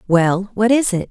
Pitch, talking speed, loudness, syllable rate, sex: 205 Hz, 165 wpm, -16 LUFS, 4.4 syllables/s, female